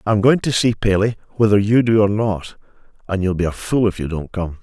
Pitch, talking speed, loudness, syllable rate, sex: 105 Hz, 235 wpm, -18 LUFS, 5.5 syllables/s, male